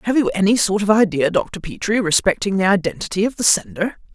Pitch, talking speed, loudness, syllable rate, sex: 200 Hz, 205 wpm, -18 LUFS, 5.9 syllables/s, female